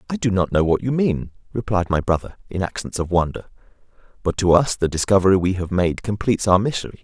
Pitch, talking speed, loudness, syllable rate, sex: 95 Hz, 215 wpm, -20 LUFS, 6.2 syllables/s, male